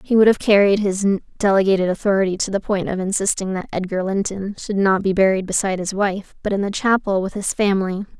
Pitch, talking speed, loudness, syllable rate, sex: 195 Hz, 210 wpm, -19 LUFS, 5.9 syllables/s, female